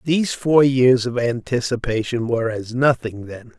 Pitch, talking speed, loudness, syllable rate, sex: 125 Hz, 150 wpm, -19 LUFS, 4.7 syllables/s, male